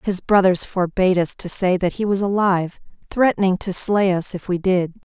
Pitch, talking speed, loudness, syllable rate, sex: 190 Hz, 200 wpm, -19 LUFS, 5.2 syllables/s, female